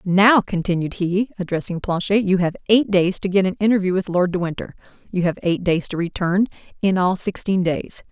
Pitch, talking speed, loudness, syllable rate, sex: 185 Hz, 190 wpm, -20 LUFS, 5.3 syllables/s, female